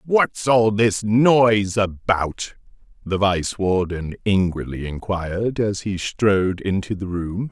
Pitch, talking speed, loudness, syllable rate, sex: 100 Hz, 130 wpm, -20 LUFS, 3.7 syllables/s, male